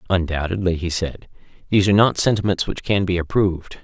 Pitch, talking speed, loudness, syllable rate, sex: 90 Hz, 170 wpm, -20 LUFS, 6.3 syllables/s, male